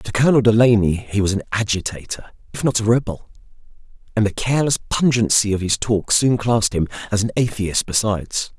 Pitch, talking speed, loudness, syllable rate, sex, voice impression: 110 Hz, 175 wpm, -18 LUFS, 5.8 syllables/s, male, masculine, middle-aged, slightly relaxed, powerful, hard, raspy, mature, unique, wild, lively, intense